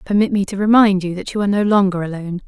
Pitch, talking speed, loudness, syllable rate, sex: 195 Hz, 265 wpm, -17 LUFS, 7.3 syllables/s, female